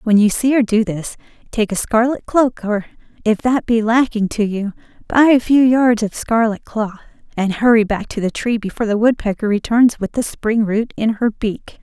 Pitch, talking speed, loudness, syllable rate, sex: 225 Hz, 210 wpm, -17 LUFS, 4.9 syllables/s, female